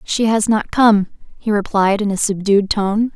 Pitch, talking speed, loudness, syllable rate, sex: 210 Hz, 190 wpm, -16 LUFS, 4.4 syllables/s, female